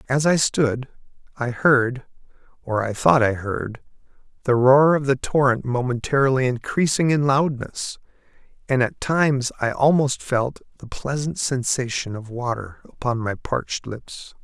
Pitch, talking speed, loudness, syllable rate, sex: 130 Hz, 140 wpm, -21 LUFS, 4.3 syllables/s, male